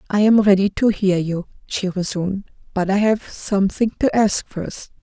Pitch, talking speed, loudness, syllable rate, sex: 200 Hz, 165 wpm, -19 LUFS, 4.8 syllables/s, female